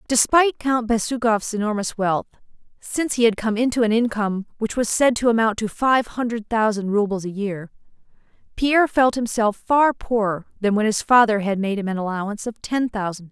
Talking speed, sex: 190 wpm, female